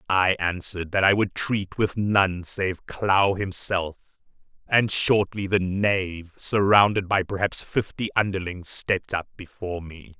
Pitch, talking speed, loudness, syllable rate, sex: 95 Hz, 140 wpm, -23 LUFS, 4.2 syllables/s, male